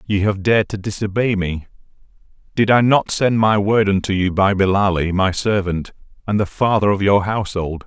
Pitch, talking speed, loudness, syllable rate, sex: 100 Hz, 185 wpm, -17 LUFS, 5.2 syllables/s, male